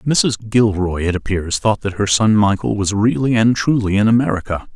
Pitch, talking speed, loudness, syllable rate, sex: 105 Hz, 190 wpm, -16 LUFS, 5.1 syllables/s, male